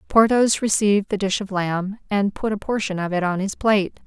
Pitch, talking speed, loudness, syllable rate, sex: 200 Hz, 220 wpm, -21 LUFS, 5.4 syllables/s, female